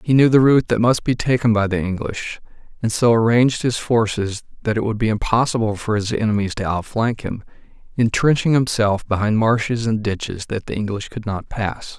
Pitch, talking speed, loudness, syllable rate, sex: 110 Hz, 195 wpm, -19 LUFS, 5.4 syllables/s, male